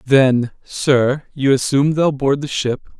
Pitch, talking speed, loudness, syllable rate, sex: 135 Hz, 160 wpm, -17 LUFS, 3.9 syllables/s, male